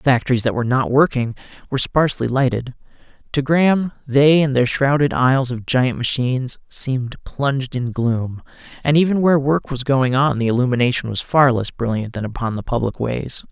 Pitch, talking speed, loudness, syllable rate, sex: 130 Hz, 180 wpm, -18 LUFS, 5.5 syllables/s, male